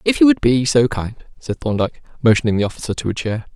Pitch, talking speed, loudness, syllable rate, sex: 125 Hz, 235 wpm, -18 LUFS, 6.4 syllables/s, male